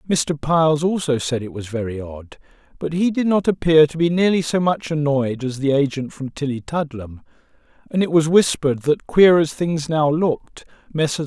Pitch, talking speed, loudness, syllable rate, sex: 150 Hz, 185 wpm, -19 LUFS, 4.9 syllables/s, male